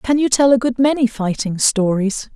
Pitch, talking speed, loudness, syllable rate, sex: 240 Hz, 205 wpm, -16 LUFS, 4.8 syllables/s, female